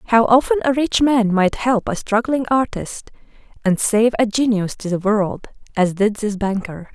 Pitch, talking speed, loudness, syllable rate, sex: 220 Hz, 180 wpm, -18 LUFS, 4.4 syllables/s, female